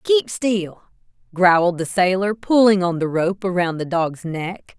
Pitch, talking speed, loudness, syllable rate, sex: 185 Hz, 165 wpm, -19 LUFS, 4.1 syllables/s, female